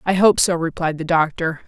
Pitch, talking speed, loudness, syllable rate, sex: 170 Hz, 215 wpm, -18 LUFS, 5.2 syllables/s, female